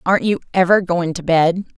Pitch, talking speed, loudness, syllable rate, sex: 180 Hz, 200 wpm, -17 LUFS, 5.7 syllables/s, female